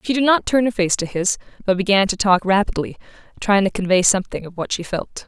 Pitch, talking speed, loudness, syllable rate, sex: 195 Hz, 240 wpm, -19 LUFS, 6.0 syllables/s, female